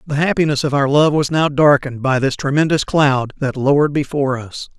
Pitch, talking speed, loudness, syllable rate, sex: 140 Hz, 200 wpm, -16 LUFS, 5.7 syllables/s, male